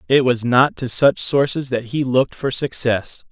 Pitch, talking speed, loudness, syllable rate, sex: 130 Hz, 200 wpm, -18 LUFS, 4.6 syllables/s, male